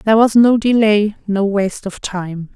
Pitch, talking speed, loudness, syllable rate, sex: 205 Hz, 190 wpm, -15 LUFS, 4.7 syllables/s, female